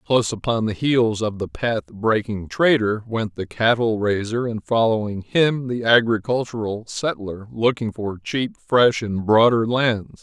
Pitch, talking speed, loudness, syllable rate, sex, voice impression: 115 Hz, 155 wpm, -21 LUFS, 4.2 syllables/s, male, very masculine, very middle-aged, very thick, tensed, powerful, dark, very hard, muffled, fluent, slightly raspy, cool, intellectual, slightly refreshing, very sincere, very calm, mature, friendly, very reassuring, very unique, very elegant, very wild, sweet, slightly lively, strict, slightly intense, slightly modest